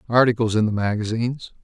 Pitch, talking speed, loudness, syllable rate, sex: 115 Hz, 145 wpm, -21 LUFS, 6.5 syllables/s, male